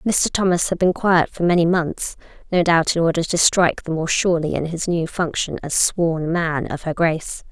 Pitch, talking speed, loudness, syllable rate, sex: 170 Hz, 215 wpm, -19 LUFS, 5.1 syllables/s, female